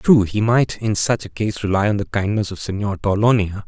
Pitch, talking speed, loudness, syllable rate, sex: 105 Hz, 230 wpm, -19 LUFS, 5.0 syllables/s, male